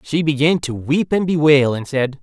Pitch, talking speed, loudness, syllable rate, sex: 145 Hz, 215 wpm, -17 LUFS, 4.7 syllables/s, male